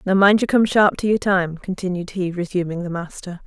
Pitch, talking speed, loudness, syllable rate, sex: 185 Hz, 225 wpm, -19 LUFS, 5.4 syllables/s, female